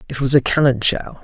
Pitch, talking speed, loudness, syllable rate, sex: 130 Hz, 245 wpm, -17 LUFS, 5.7 syllables/s, male